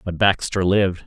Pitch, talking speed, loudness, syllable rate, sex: 95 Hz, 170 wpm, -19 LUFS, 5.2 syllables/s, male